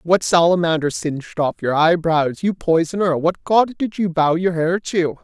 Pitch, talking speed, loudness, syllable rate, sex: 170 Hz, 185 wpm, -18 LUFS, 4.7 syllables/s, male